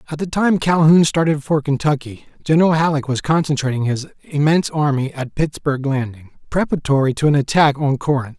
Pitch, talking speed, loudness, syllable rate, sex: 145 Hz, 165 wpm, -17 LUFS, 5.8 syllables/s, male